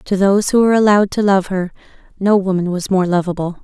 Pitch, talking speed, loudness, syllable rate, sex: 190 Hz, 215 wpm, -15 LUFS, 6.4 syllables/s, female